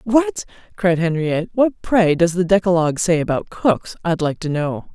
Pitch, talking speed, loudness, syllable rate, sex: 180 Hz, 180 wpm, -18 LUFS, 4.8 syllables/s, female